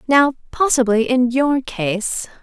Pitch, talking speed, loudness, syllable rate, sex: 250 Hz, 125 wpm, -18 LUFS, 4.1 syllables/s, female